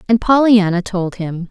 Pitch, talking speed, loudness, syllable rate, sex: 200 Hz, 160 wpm, -15 LUFS, 4.5 syllables/s, female